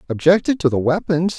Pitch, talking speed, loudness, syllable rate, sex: 165 Hz, 175 wpm, -17 LUFS, 5.8 syllables/s, male